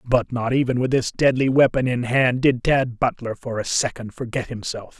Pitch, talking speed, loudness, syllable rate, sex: 125 Hz, 205 wpm, -21 LUFS, 5.0 syllables/s, male